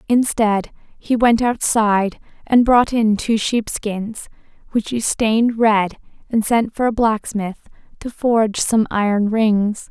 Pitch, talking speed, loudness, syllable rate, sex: 220 Hz, 140 wpm, -18 LUFS, 3.8 syllables/s, female